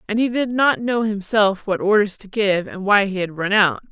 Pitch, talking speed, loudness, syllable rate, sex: 205 Hz, 245 wpm, -19 LUFS, 4.9 syllables/s, female